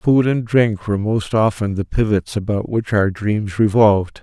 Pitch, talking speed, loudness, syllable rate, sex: 105 Hz, 185 wpm, -18 LUFS, 4.5 syllables/s, male